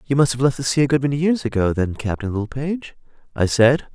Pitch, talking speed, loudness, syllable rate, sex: 130 Hz, 245 wpm, -20 LUFS, 6.4 syllables/s, male